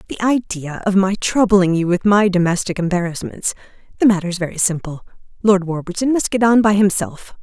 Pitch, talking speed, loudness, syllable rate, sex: 190 Hz, 170 wpm, -17 LUFS, 5.4 syllables/s, female